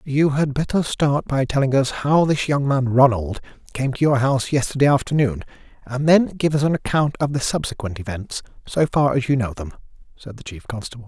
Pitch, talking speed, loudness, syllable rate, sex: 135 Hz, 205 wpm, -20 LUFS, 5.5 syllables/s, male